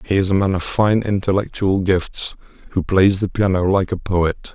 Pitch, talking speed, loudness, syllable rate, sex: 95 Hz, 200 wpm, -18 LUFS, 4.7 syllables/s, male